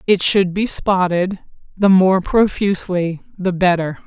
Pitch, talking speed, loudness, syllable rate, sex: 185 Hz, 135 wpm, -16 LUFS, 4.1 syllables/s, female